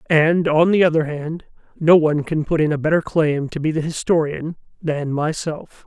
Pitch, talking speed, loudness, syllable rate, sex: 155 Hz, 195 wpm, -19 LUFS, 4.9 syllables/s, male